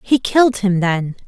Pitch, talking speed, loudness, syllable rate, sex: 215 Hz, 190 wpm, -16 LUFS, 4.6 syllables/s, female